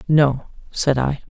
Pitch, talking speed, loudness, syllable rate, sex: 145 Hz, 140 wpm, -19 LUFS, 3.5 syllables/s, female